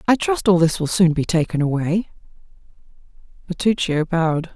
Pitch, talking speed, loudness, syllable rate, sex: 175 Hz, 145 wpm, -19 LUFS, 5.3 syllables/s, female